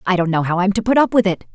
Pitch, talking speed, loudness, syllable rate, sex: 195 Hz, 390 wpm, -17 LUFS, 7.3 syllables/s, female